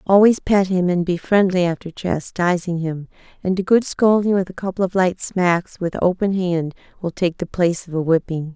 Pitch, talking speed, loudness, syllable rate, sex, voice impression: 180 Hz, 205 wpm, -19 LUFS, 5.0 syllables/s, female, very feminine, slightly young, slightly adult-like, very thin, relaxed, slightly weak, slightly dark, slightly hard, slightly muffled, slightly halting, very cute, intellectual, sincere, very calm, very friendly, very reassuring, unique, very elegant, very sweet, very kind